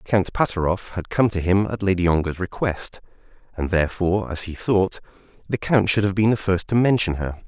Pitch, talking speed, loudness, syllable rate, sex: 95 Hz, 200 wpm, -21 LUFS, 5.4 syllables/s, male